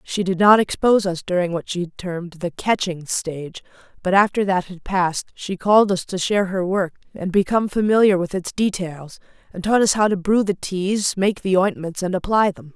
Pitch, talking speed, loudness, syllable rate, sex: 185 Hz, 205 wpm, -20 LUFS, 5.3 syllables/s, female